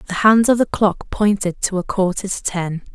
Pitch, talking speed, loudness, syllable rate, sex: 195 Hz, 225 wpm, -18 LUFS, 4.9 syllables/s, female